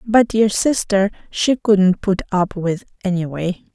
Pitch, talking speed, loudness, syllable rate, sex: 195 Hz, 145 wpm, -18 LUFS, 3.9 syllables/s, female